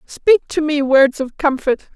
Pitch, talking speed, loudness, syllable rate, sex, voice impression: 290 Hz, 185 wpm, -16 LUFS, 4.1 syllables/s, female, gender-neutral, adult-like, slightly weak, soft, muffled, slightly halting, slightly calm, friendly, unique, kind, modest